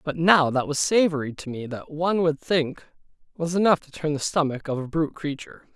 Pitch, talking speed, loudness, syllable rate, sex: 155 Hz, 220 wpm, -24 LUFS, 5.6 syllables/s, male